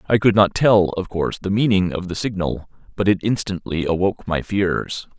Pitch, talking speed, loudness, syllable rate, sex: 100 Hz, 195 wpm, -20 LUFS, 5.2 syllables/s, male